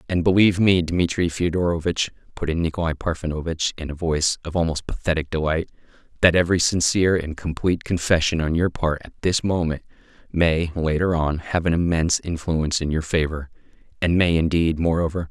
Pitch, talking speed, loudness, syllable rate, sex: 85 Hz, 165 wpm, -22 LUFS, 5.8 syllables/s, male